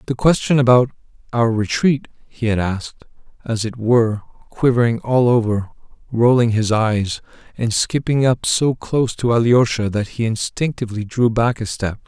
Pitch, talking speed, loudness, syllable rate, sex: 115 Hz, 155 wpm, -18 LUFS, 4.9 syllables/s, male